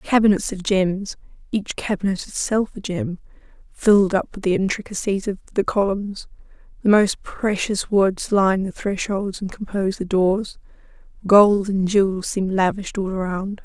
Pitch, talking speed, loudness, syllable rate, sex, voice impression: 195 Hz, 145 wpm, -21 LUFS, 4.6 syllables/s, female, feminine, adult-like, soft, calm, slightly sweet